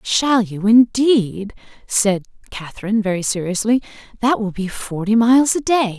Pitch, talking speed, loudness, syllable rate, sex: 215 Hz, 140 wpm, -17 LUFS, 4.7 syllables/s, female